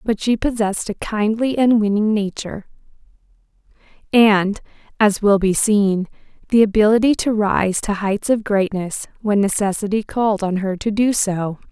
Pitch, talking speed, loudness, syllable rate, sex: 210 Hz, 150 wpm, -18 LUFS, 4.7 syllables/s, female